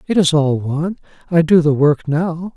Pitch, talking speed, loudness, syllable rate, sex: 160 Hz, 190 wpm, -16 LUFS, 4.7 syllables/s, male